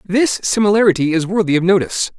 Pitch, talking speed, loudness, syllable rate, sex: 190 Hz, 165 wpm, -15 LUFS, 6.4 syllables/s, male